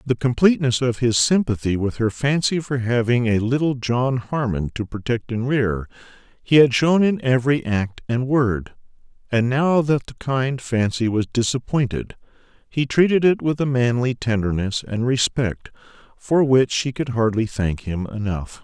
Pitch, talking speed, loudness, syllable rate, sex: 125 Hz, 165 wpm, -20 LUFS, 4.6 syllables/s, male